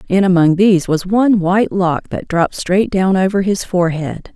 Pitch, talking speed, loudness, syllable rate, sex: 185 Hz, 195 wpm, -15 LUFS, 5.3 syllables/s, female